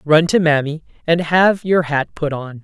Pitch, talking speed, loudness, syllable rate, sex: 160 Hz, 205 wpm, -16 LUFS, 4.3 syllables/s, female